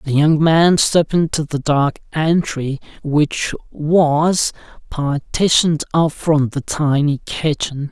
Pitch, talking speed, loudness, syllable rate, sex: 155 Hz, 120 wpm, -17 LUFS, 3.6 syllables/s, male